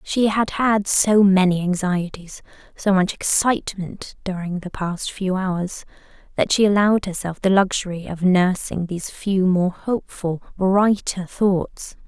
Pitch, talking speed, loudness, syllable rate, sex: 190 Hz, 140 wpm, -20 LUFS, 4.2 syllables/s, female